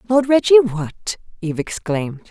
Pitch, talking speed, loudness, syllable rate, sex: 205 Hz, 130 wpm, -18 LUFS, 5.2 syllables/s, female